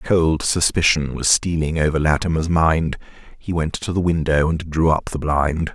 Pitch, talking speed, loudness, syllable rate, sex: 80 Hz, 190 wpm, -19 LUFS, 4.8 syllables/s, male